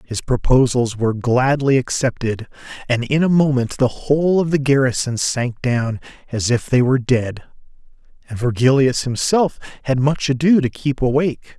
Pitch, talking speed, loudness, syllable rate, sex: 130 Hz, 155 wpm, -18 LUFS, 5.0 syllables/s, male